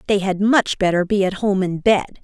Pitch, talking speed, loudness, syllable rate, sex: 195 Hz, 240 wpm, -18 LUFS, 4.9 syllables/s, female